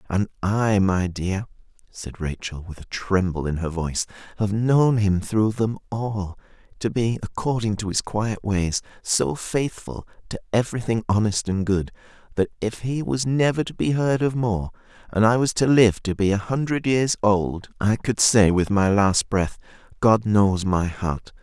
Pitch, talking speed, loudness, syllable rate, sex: 105 Hz, 180 wpm, -22 LUFS, 4.3 syllables/s, male